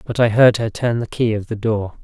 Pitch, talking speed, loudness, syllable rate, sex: 110 Hz, 295 wpm, -18 LUFS, 5.3 syllables/s, male